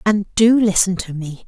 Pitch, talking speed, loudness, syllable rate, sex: 195 Hz, 205 wpm, -16 LUFS, 4.4 syllables/s, female